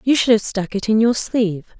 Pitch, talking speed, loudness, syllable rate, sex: 215 Hz, 265 wpm, -18 LUFS, 5.7 syllables/s, female